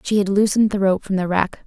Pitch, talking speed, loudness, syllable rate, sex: 195 Hz, 290 wpm, -19 LUFS, 6.4 syllables/s, female